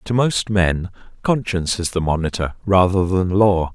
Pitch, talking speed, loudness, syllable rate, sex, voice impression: 95 Hz, 160 wpm, -19 LUFS, 4.6 syllables/s, male, masculine, middle-aged, tensed, bright, soft, raspy, cool, intellectual, sincere, calm, friendly, reassuring, wild, lively, kind